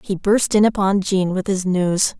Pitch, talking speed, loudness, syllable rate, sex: 190 Hz, 220 wpm, -18 LUFS, 4.3 syllables/s, female